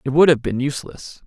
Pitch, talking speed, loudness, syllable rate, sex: 140 Hz, 235 wpm, -18 LUFS, 6.2 syllables/s, male